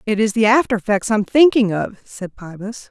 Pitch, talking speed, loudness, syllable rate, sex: 215 Hz, 205 wpm, -16 LUFS, 5.2 syllables/s, female